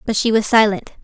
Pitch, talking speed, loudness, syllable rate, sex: 215 Hz, 235 wpm, -15 LUFS, 6.4 syllables/s, female